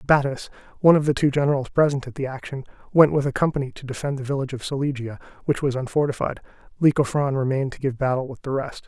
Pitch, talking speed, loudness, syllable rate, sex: 135 Hz, 210 wpm, -23 LUFS, 7.0 syllables/s, male